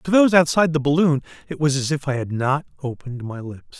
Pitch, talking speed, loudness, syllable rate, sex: 145 Hz, 235 wpm, -20 LUFS, 6.6 syllables/s, male